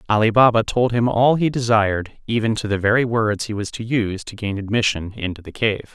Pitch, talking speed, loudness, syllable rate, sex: 110 Hz, 220 wpm, -19 LUFS, 5.6 syllables/s, male